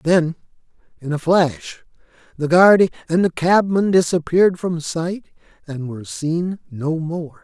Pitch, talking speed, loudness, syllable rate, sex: 165 Hz, 135 wpm, -18 LUFS, 4.2 syllables/s, male